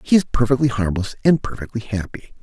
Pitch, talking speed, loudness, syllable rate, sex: 115 Hz, 175 wpm, -20 LUFS, 6.0 syllables/s, male